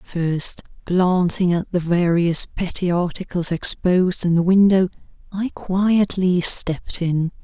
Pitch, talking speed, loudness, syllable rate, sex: 180 Hz, 120 wpm, -19 LUFS, 3.9 syllables/s, female